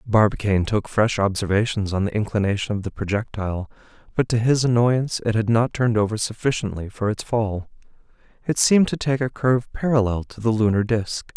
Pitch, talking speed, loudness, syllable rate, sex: 110 Hz, 180 wpm, -22 LUFS, 5.9 syllables/s, male